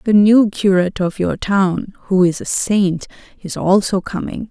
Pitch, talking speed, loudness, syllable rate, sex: 195 Hz, 175 wpm, -16 LUFS, 4.2 syllables/s, female